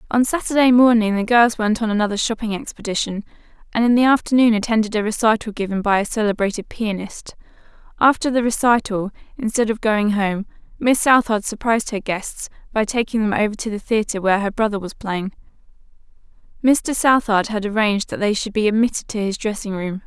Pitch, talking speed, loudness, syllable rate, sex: 220 Hz, 175 wpm, -19 LUFS, 5.8 syllables/s, female